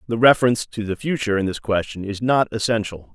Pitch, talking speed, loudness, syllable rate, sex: 110 Hz, 210 wpm, -20 LUFS, 6.4 syllables/s, male